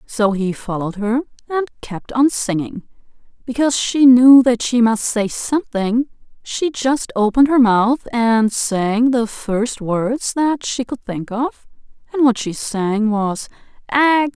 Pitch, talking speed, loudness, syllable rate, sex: 235 Hz, 155 wpm, -17 LUFS, 3.9 syllables/s, female